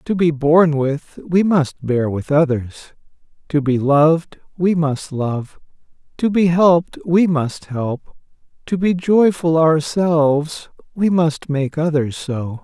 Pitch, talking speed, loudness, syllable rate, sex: 155 Hz, 140 wpm, -17 LUFS, 3.7 syllables/s, male